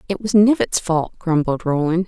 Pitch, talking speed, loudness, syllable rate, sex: 180 Hz, 175 wpm, -18 LUFS, 4.9 syllables/s, female